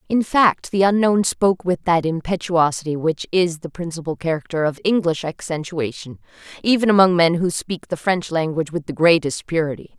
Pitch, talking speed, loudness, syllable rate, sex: 170 Hz, 170 wpm, -19 LUFS, 5.3 syllables/s, female